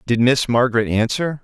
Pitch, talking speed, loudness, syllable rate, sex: 120 Hz, 165 wpm, -17 LUFS, 5.3 syllables/s, male